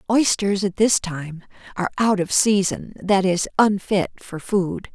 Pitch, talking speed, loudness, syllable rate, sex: 195 Hz, 145 wpm, -20 LUFS, 4.0 syllables/s, female